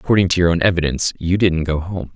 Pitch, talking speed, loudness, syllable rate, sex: 90 Hz, 250 wpm, -17 LUFS, 6.8 syllables/s, male